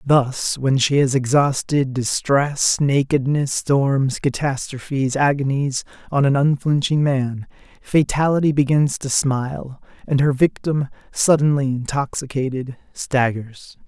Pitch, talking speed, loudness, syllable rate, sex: 135 Hz, 105 wpm, -19 LUFS, 3.9 syllables/s, male